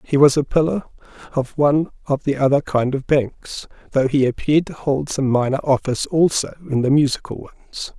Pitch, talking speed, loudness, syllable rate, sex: 140 Hz, 190 wpm, -19 LUFS, 5.6 syllables/s, male